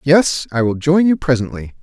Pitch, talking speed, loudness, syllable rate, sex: 140 Hz, 195 wpm, -16 LUFS, 4.9 syllables/s, male